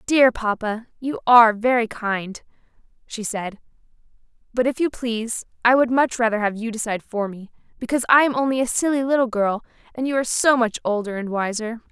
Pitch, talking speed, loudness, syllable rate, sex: 235 Hz, 185 wpm, -21 LUFS, 5.7 syllables/s, female